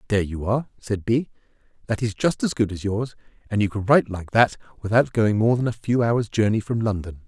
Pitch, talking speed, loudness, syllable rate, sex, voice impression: 110 Hz, 230 wpm, -22 LUFS, 5.9 syllables/s, male, very masculine, middle-aged, very thick, tensed, powerful, bright, slightly soft, slightly muffled, fluent, very cool, intellectual, slightly refreshing, sincere, calm, mature, friendly, reassuring, slightly wild, slightly kind, slightly modest